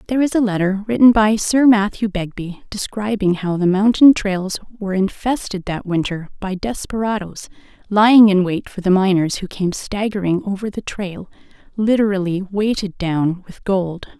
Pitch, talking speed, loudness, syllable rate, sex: 200 Hz, 155 wpm, -18 LUFS, 4.8 syllables/s, female